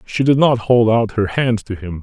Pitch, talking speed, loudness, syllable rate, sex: 115 Hz, 265 wpm, -16 LUFS, 4.7 syllables/s, male